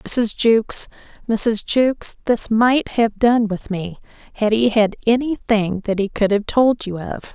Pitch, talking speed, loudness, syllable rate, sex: 220 Hz, 180 wpm, -18 LUFS, 4.0 syllables/s, female